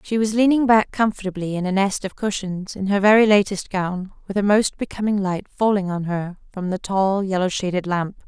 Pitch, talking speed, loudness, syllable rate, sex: 195 Hz, 210 wpm, -20 LUFS, 5.2 syllables/s, female